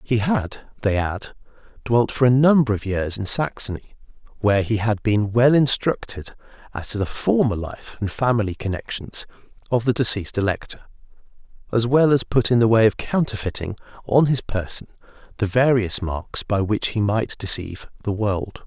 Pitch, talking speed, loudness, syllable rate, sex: 110 Hz, 165 wpm, -21 LUFS, 5.0 syllables/s, male